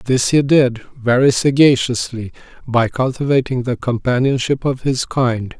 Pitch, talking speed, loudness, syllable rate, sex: 125 Hz, 130 wpm, -16 LUFS, 4.5 syllables/s, male